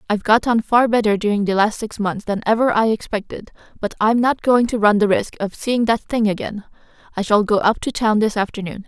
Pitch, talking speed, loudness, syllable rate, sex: 215 Hz, 235 wpm, -18 LUFS, 5.6 syllables/s, female